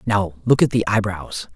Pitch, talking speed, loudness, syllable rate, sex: 100 Hz, 195 wpm, -20 LUFS, 4.6 syllables/s, male